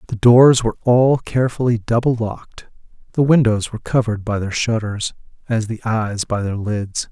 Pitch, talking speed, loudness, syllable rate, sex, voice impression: 115 Hz, 170 wpm, -18 LUFS, 5.2 syllables/s, male, masculine, adult-like, cool, slightly refreshing, sincere, kind